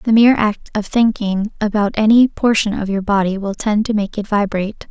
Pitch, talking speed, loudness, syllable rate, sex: 210 Hz, 210 wpm, -16 LUFS, 5.4 syllables/s, female